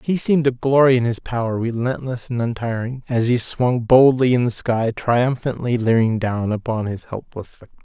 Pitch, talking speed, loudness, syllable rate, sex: 120 Hz, 185 wpm, -19 LUFS, 5.0 syllables/s, male